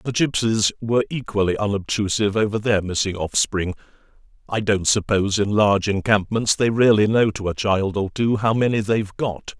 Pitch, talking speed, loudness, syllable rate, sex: 105 Hz, 170 wpm, -20 LUFS, 5.4 syllables/s, male